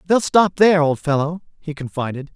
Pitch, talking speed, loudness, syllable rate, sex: 160 Hz, 180 wpm, -18 LUFS, 5.5 syllables/s, male